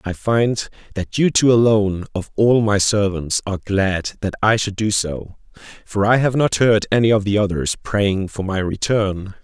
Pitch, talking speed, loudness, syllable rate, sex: 105 Hz, 190 wpm, -18 LUFS, 4.5 syllables/s, male